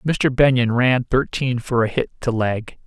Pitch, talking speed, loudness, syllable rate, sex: 120 Hz, 190 wpm, -19 LUFS, 4.1 syllables/s, male